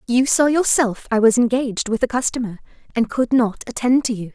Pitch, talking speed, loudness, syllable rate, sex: 240 Hz, 205 wpm, -18 LUFS, 5.5 syllables/s, female